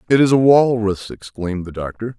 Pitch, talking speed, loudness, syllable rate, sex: 110 Hz, 190 wpm, -17 LUFS, 5.6 syllables/s, male